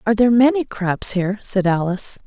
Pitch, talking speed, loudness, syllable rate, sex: 210 Hz, 185 wpm, -18 LUFS, 6.3 syllables/s, female